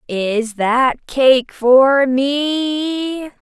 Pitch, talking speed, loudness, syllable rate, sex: 280 Hz, 85 wpm, -15 LUFS, 1.6 syllables/s, female